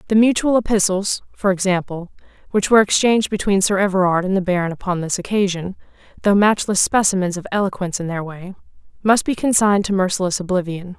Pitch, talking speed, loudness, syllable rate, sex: 190 Hz, 170 wpm, -18 LUFS, 6.2 syllables/s, female